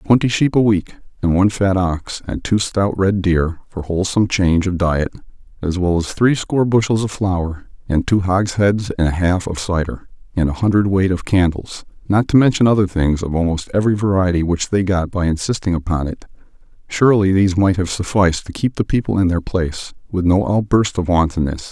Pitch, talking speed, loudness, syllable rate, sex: 95 Hz, 195 wpm, -17 LUFS, 5.2 syllables/s, male